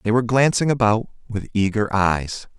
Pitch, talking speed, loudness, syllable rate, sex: 110 Hz, 160 wpm, -20 LUFS, 5.3 syllables/s, male